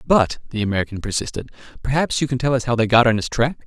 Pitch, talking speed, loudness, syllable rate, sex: 120 Hz, 245 wpm, -20 LUFS, 7.0 syllables/s, male